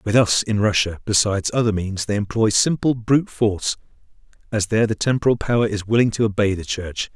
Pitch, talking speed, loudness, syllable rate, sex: 110 Hz, 195 wpm, -20 LUFS, 5.9 syllables/s, male